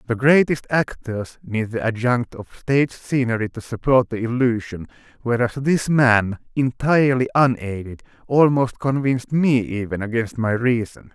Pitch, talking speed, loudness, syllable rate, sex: 120 Hz, 135 wpm, -20 LUFS, 4.6 syllables/s, male